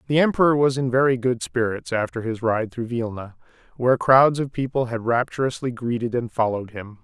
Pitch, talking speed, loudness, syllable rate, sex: 120 Hz, 190 wpm, -22 LUFS, 5.6 syllables/s, male